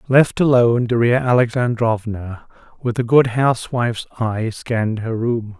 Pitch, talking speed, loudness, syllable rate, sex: 115 Hz, 130 wpm, -18 LUFS, 4.6 syllables/s, male